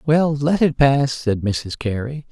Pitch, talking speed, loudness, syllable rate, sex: 135 Hz, 180 wpm, -19 LUFS, 3.8 syllables/s, male